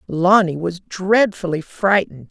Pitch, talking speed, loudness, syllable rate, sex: 180 Hz, 105 wpm, -18 LUFS, 4.4 syllables/s, female